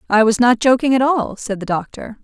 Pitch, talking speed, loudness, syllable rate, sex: 235 Hz, 240 wpm, -16 LUFS, 5.5 syllables/s, female